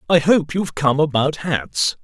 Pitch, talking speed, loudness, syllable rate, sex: 150 Hz, 175 wpm, -18 LUFS, 4.4 syllables/s, male